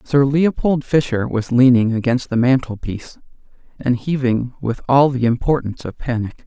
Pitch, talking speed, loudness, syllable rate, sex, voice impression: 125 Hz, 150 wpm, -18 LUFS, 4.9 syllables/s, male, masculine, adult-like, weak, dark, halting, calm, friendly, reassuring, kind, modest